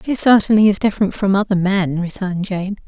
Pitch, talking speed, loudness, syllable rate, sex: 195 Hz, 190 wpm, -16 LUFS, 5.9 syllables/s, female